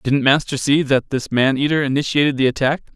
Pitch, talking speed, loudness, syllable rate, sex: 140 Hz, 205 wpm, -17 LUFS, 5.7 syllables/s, male